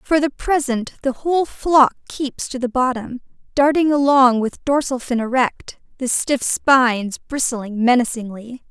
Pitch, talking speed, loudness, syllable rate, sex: 260 Hz, 145 wpm, -18 LUFS, 4.2 syllables/s, female